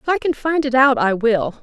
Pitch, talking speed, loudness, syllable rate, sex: 250 Hz, 295 wpm, -17 LUFS, 5.2 syllables/s, female